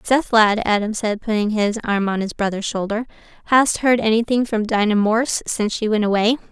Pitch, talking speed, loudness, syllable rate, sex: 215 Hz, 195 wpm, -19 LUFS, 5.4 syllables/s, female